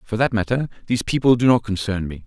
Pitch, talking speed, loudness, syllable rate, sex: 110 Hz, 240 wpm, -20 LUFS, 6.6 syllables/s, male